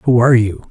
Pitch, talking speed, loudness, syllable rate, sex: 120 Hz, 255 wpm, -13 LUFS, 6.0 syllables/s, male